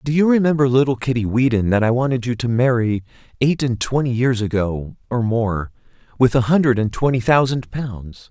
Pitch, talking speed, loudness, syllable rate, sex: 125 Hz, 190 wpm, -18 LUFS, 5.3 syllables/s, male